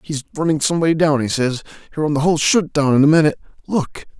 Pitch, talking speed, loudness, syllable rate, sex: 150 Hz, 215 wpm, -17 LUFS, 7.0 syllables/s, male